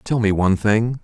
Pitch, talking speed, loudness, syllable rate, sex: 110 Hz, 230 wpm, -18 LUFS, 5.1 syllables/s, male